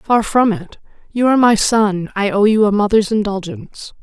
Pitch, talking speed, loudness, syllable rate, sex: 210 Hz, 195 wpm, -15 LUFS, 5.0 syllables/s, female